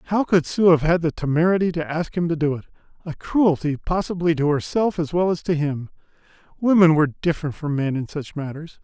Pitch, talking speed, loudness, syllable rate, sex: 165 Hz, 205 wpm, -21 LUFS, 5.8 syllables/s, male